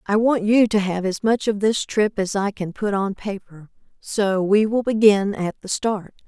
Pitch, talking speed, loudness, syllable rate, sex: 205 Hz, 220 wpm, -20 LUFS, 4.4 syllables/s, female